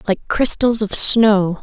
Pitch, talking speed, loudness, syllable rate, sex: 210 Hz, 150 wpm, -15 LUFS, 3.4 syllables/s, female